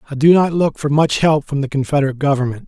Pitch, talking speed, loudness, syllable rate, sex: 145 Hz, 245 wpm, -16 LUFS, 7.0 syllables/s, male